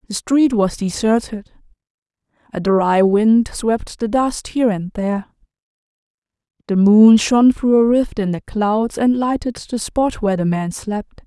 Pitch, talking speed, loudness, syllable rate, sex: 220 Hz, 160 wpm, -17 LUFS, 4.2 syllables/s, female